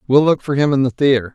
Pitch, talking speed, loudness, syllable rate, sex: 135 Hz, 310 wpm, -16 LUFS, 6.7 syllables/s, male